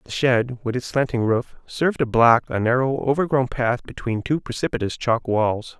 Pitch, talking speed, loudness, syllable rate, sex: 125 Hz, 185 wpm, -21 LUFS, 4.9 syllables/s, male